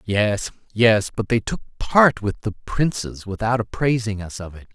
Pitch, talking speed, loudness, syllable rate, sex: 110 Hz, 175 wpm, -21 LUFS, 4.4 syllables/s, male